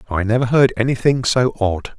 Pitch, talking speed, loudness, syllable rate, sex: 115 Hz, 180 wpm, -17 LUFS, 5.5 syllables/s, male